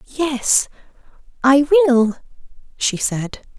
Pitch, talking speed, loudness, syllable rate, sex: 270 Hz, 85 wpm, -17 LUFS, 2.9 syllables/s, female